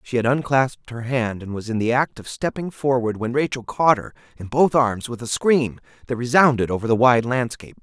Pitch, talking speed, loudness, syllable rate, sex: 125 Hz, 220 wpm, -21 LUFS, 5.5 syllables/s, male